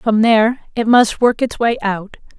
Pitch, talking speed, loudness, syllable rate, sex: 225 Hz, 200 wpm, -15 LUFS, 4.5 syllables/s, female